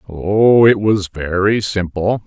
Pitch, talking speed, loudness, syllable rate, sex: 100 Hz, 135 wpm, -15 LUFS, 3.4 syllables/s, male